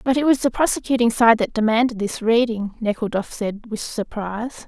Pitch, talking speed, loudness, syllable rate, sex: 230 Hz, 180 wpm, -20 LUFS, 5.3 syllables/s, female